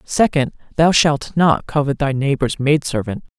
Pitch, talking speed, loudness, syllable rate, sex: 140 Hz, 160 wpm, -17 LUFS, 4.5 syllables/s, female